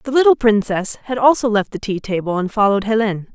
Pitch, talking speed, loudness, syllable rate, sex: 215 Hz, 215 wpm, -17 LUFS, 6.5 syllables/s, female